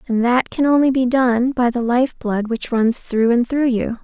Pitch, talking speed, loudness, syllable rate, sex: 245 Hz, 240 wpm, -17 LUFS, 4.4 syllables/s, female